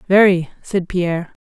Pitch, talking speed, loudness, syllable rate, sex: 180 Hz, 125 wpm, -17 LUFS, 4.7 syllables/s, female